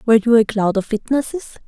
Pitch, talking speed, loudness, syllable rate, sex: 230 Hz, 215 wpm, -17 LUFS, 6.9 syllables/s, female